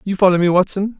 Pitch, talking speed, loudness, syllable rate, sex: 190 Hz, 240 wpm, -15 LUFS, 6.7 syllables/s, male